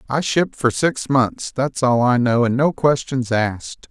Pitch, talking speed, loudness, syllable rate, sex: 130 Hz, 200 wpm, -18 LUFS, 4.3 syllables/s, male